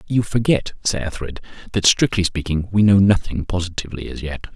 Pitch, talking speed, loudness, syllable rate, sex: 95 Hz, 160 wpm, -19 LUFS, 5.9 syllables/s, male